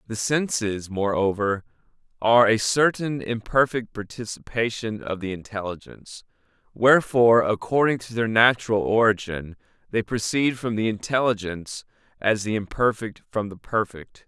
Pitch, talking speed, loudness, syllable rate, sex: 110 Hz, 120 wpm, -23 LUFS, 4.9 syllables/s, male